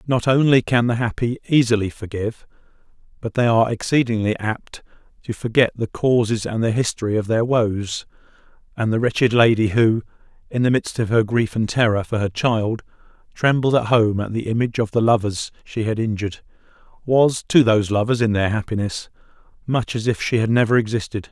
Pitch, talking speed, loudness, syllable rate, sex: 115 Hz, 180 wpm, -20 LUFS, 5.5 syllables/s, male